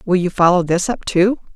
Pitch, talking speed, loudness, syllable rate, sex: 185 Hz, 230 wpm, -16 LUFS, 5.3 syllables/s, female